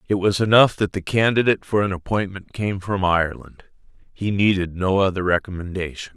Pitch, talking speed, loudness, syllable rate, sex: 95 Hz, 165 wpm, -20 LUFS, 5.5 syllables/s, male